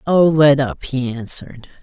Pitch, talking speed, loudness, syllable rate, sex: 140 Hz, 165 wpm, -16 LUFS, 4.5 syllables/s, female